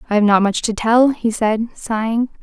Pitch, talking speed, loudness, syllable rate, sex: 225 Hz, 225 wpm, -17 LUFS, 4.9 syllables/s, female